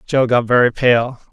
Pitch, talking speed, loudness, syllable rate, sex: 120 Hz, 180 wpm, -15 LUFS, 4.6 syllables/s, male